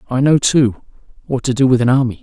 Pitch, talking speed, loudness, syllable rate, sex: 125 Hz, 245 wpm, -15 LUFS, 6.2 syllables/s, male